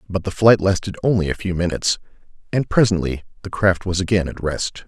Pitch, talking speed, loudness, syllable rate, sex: 95 Hz, 195 wpm, -19 LUFS, 5.9 syllables/s, male